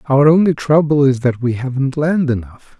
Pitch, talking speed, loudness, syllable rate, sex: 140 Hz, 195 wpm, -15 LUFS, 5.0 syllables/s, male